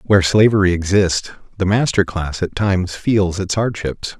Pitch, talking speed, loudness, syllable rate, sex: 95 Hz, 155 wpm, -17 LUFS, 4.8 syllables/s, male